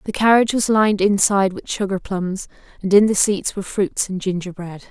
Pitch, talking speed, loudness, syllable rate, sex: 195 Hz, 195 wpm, -18 LUFS, 5.7 syllables/s, female